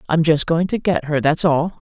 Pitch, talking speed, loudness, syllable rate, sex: 160 Hz, 255 wpm, -18 LUFS, 4.9 syllables/s, female